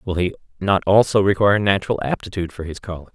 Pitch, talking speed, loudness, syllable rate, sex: 95 Hz, 190 wpm, -19 LUFS, 6.9 syllables/s, male